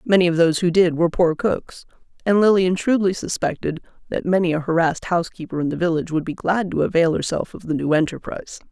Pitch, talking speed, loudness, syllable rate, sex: 170 Hz, 205 wpm, -20 LUFS, 6.4 syllables/s, female